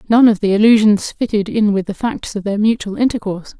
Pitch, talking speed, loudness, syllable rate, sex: 210 Hz, 215 wpm, -15 LUFS, 5.9 syllables/s, female